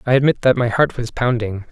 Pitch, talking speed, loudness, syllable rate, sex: 120 Hz, 245 wpm, -18 LUFS, 5.7 syllables/s, male